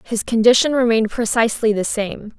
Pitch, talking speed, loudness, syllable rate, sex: 225 Hz, 150 wpm, -17 LUFS, 5.7 syllables/s, female